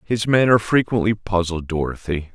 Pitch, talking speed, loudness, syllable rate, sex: 100 Hz, 130 wpm, -19 LUFS, 4.9 syllables/s, male